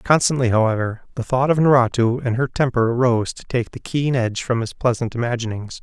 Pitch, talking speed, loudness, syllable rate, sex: 120 Hz, 195 wpm, -20 LUFS, 5.8 syllables/s, male